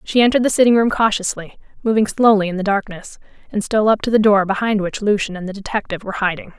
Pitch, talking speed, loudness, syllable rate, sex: 205 Hz, 230 wpm, -17 LUFS, 7.0 syllables/s, female